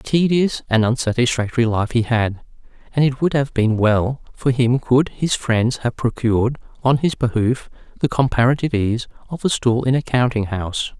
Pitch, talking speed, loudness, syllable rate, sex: 125 Hz, 180 wpm, -19 LUFS, 5.1 syllables/s, male